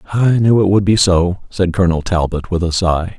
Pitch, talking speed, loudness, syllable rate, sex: 90 Hz, 225 wpm, -15 LUFS, 5.3 syllables/s, male